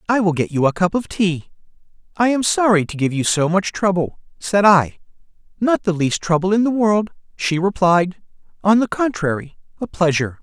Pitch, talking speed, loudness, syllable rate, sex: 185 Hz, 190 wpm, -18 LUFS, 5.2 syllables/s, male